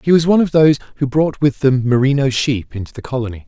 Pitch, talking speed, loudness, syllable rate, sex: 135 Hz, 240 wpm, -15 LUFS, 6.7 syllables/s, male